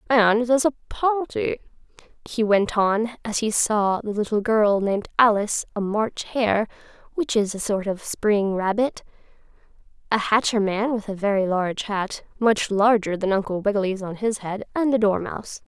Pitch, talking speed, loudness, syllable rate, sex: 215 Hz, 170 wpm, -22 LUFS, 4.5 syllables/s, female